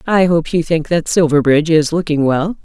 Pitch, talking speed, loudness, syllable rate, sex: 160 Hz, 205 wpm, -14 LUFS, 5.3 syllables/s, female